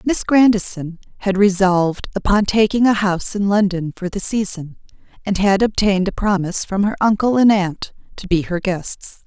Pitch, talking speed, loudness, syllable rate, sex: 195 Hz, 175 wpm, -17 LUFS, 5.1 syllables/s, female